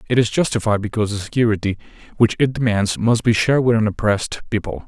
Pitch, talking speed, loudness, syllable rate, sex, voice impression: 110 Hz, 195 wpm, -19 LUFS, 6.7 syllables/s, male, masculine, adult-like, tensed, clear, fluent, cool, intellectual, sincere, calm, slightly mature, friendly, unique, slightly wild, kind